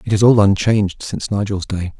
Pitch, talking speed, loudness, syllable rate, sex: 100 Hz, 210 wpm, -16 LUFS, 6.0 syllables/s, male